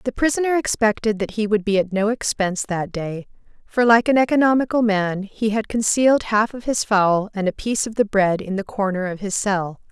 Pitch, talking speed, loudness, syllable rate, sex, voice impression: 210 Hz, 220 wpm, -20 LUFS, 5.4 syllables/s, female, very feminine, slightly young, very thin, slightly tensed, slightly powerful, bright, slightly soft, very clear, fluent, cute, slightly cool, intellectual, very refreshing, sincere, calm, friendly, reassuring, unique, elegant, slightly wild, sweet, lively, slightly strict, slightly intense, slightly sharp